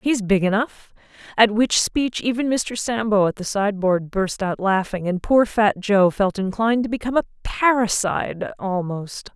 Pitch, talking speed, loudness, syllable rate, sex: 210 Hz, 165 wpm, -20 LUFS, 4.7 syllables/s, female